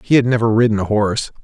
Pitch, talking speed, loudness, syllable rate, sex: 110 Hz, 250 wpm, -16 LUFS, 7.3 syllables/s, male